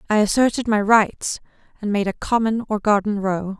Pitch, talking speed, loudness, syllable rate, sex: 210 Hz, 185 wpm, -20 LUFS, 5.1 syllables/s, female